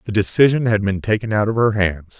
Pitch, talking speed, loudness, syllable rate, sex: 105 Hz, 245 wpm, -17 LUFS, 5.9 syllables/s, male